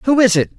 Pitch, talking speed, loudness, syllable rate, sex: 225 Hz, 305 wpm, -14 LUFS, 5.9 syllables/s, male